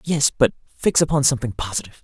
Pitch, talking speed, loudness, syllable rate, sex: 135 Hz, 175 wpm, -20 LUFS, 6.6 syllables/s, male